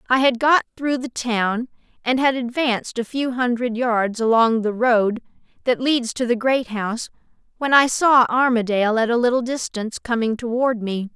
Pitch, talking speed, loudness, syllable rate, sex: 240 Hz, 180 wpm, -20 LUFS, 4.8 syllables/s, female